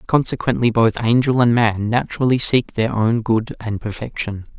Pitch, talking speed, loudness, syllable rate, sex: 115 Hz, 155 wpm, -18 LUFS, 4.9 syllables/s, male